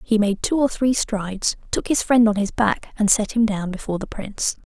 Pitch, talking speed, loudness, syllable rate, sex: 215 Hz, 245 wpm, -21 LUFS, 5.4 syllables/s, female